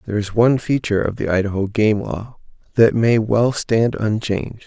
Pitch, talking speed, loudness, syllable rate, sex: 110 Hz, 180 wpm, -18 LUFS, 5.3 syllables/s, male